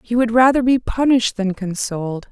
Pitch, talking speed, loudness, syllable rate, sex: 225 Hz, 180 wpm, -17 LUFS, 5.4 syllables/s, female